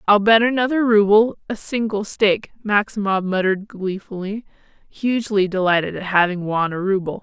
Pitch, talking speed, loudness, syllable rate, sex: 205 Hz, 140 wpm, -19 LUFS, 5.3 syllables/s, female